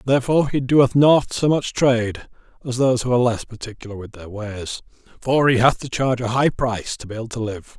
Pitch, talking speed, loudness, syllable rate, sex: 120 Hz, 225 wpm, -19 LUFS, 6.1 syllables/s, male